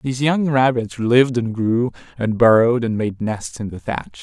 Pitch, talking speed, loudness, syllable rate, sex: 120 Hz, 200 wpm, -18 LUFS, 4.8 syllables/s, male